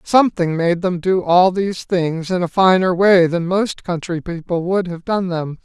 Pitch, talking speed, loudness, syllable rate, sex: 180 Hz, 200 wpm, -17 LUFS, 4.5 syllables/s, male